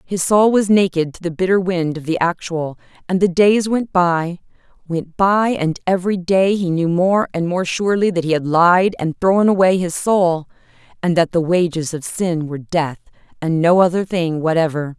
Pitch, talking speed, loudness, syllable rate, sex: 175 Hz, 195 wpm, -17 LUFS, 4.8 syllables/s, female